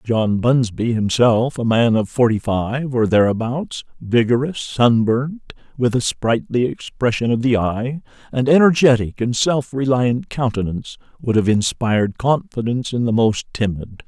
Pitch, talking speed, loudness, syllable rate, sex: 120 Hz, 140 wpm, -18 LUFS, 4.4 syllables/s, male